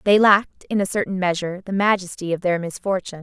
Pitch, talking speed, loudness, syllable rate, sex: 190 Hz, 205 wpm, -21 LUFS, 6.6 syllables/s, female